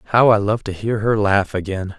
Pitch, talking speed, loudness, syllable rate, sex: 105 Hz, 240 wpm, -18 LUFS, 5.8 syllables/s, male